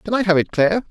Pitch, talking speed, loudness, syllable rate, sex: 190 Hz, 335 wpm, -18 LUFS, 8.1 syllables/s, male